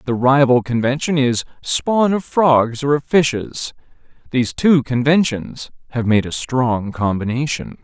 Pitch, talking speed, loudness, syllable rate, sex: 130 Hz, 140 wpm, -17 LUFS, 4.2 syllables/s, male